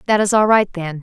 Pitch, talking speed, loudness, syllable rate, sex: 195 Hz, 295 wpm, -15 LUFS, 5.8 syllables/s, female